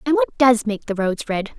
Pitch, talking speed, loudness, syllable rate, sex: 225 Hz, 265 wpm, -19 LUFS, 5.2 syllables/s, female